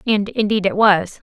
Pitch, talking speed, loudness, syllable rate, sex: 205 Hz, 185 wpm, -17 LUFS, 4.6 syllables/s, female